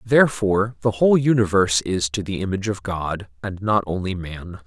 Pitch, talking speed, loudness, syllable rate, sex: 100 Hz, 180 wpm, -21 LUFS, 5.6 syllables/s, male